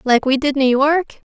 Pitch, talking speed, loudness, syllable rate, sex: 275 Hz, 230 wpm, -16 LUFS, 4.4 syllables/s, female